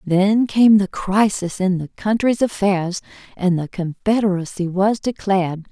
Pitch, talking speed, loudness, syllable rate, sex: 195 Hz, 135 wpm, -19 LUFS, 4.2 syllables/s, female